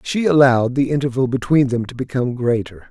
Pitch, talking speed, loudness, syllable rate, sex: 130 Hz, 185 wpm, -18 LUFS, 6.1 syllables/s, male